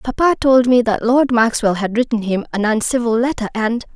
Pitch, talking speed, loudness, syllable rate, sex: 235 Hz, 195 wpm, -16 LUFS, 5.3 syllables/s, female